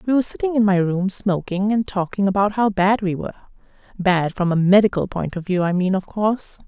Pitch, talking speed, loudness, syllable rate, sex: 195 Hz, 215 wpm, -20 LUFS, 5.8 syllables/s, female